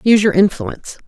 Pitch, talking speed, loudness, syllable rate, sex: 205 Hz, 170 wpm, -14 LUFS, 6.7 syllables/s, female